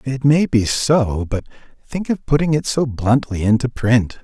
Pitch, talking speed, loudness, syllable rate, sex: 125 Hz, 185 wpm, -18 LUFS, 4.3 syllables/s, male